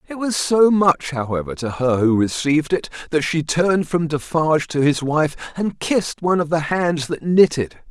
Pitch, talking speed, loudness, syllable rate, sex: 160 Hz, 195 wpm, -19 LUFS, 4.9 syllables/s, male